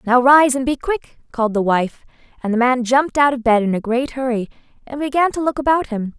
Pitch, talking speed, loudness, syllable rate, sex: 255 Hz, 240 wpm, -17 LUFS, 5.8 syllables/s, female